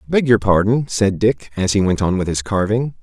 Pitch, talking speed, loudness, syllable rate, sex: 105 Hz, 240 wpm, -17 LUFS, 5.1 syllables/s, male